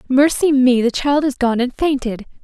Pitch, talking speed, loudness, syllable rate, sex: 260 Hz, 195 wpm, -16 LUFS, 4.8 syllables/s, female